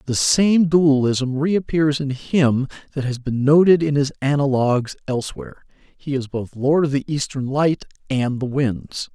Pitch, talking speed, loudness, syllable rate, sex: 140 Hz, 165 wpm, -19 LUFS, 4.4 syllables/s, male